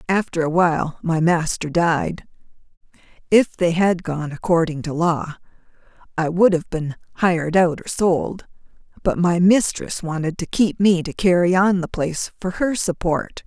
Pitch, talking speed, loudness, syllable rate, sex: 175 Hz, 155 wpm, -20 LUFS, 4.4 syllables/s, female